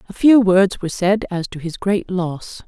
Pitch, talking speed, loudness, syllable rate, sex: 190 Hz, 225 wpm, -17 LUFS, 4.6 syllables/s, female